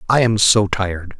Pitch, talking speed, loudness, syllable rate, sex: 105 Hz, 200 wpm, -16 LUFS, 5.0 syllables/s, male